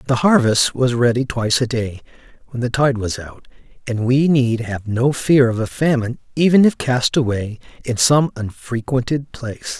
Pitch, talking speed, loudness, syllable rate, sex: 125 Hz, 180 wpm, -18 LUFS, 4.8 syllables/s, male